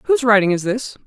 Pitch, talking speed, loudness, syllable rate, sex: 225 Hz, 225 wpm, -17 LUFS, 7.3 syllables/s, female